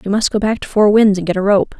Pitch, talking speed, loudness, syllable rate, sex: 205 Hz, 370 wpm, -14 LUFS, 6.6 syllables/s, female